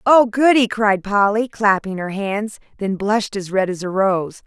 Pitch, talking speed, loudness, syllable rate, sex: 205 Hz, 190 wpm, -18 LUFS, 4.3 syllables/s, female